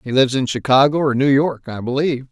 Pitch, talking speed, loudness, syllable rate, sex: 135 Hz, 235 wpm, -17 LUFS, 6.3 syllables/s, male